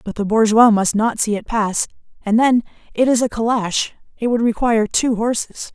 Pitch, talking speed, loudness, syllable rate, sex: 225 Hz, 190 wpm, -17 LUFS, 5.0 syllables/s, female